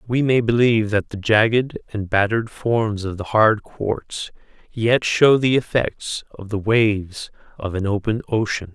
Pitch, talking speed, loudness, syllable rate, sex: 110 Hz, 165 wpm, -20 LUFS, 4.3 syllables/s, male